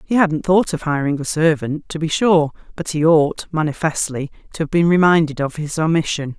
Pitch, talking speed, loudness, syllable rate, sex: 160 Hz, 195 wpm, -18 LUFS, 5.1 syllables/s, female